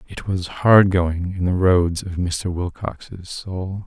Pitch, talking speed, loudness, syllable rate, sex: 90 Hz, 170 wpm, -20 LUFS, 3.3 syllables/s, male